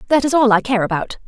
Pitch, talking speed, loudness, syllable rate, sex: 235 Hz, 280 wpm, -16 LUFS, 6.8 syllables/s, female